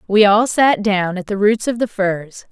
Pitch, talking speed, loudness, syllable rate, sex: 205 Hz, 240 wpm, -16 LUFS, 4.3 syllables/s, female